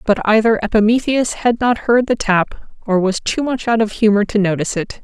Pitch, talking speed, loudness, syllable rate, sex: 215 Hz, 215 wpm, -16 LUFS, 5.2 syllables/s, female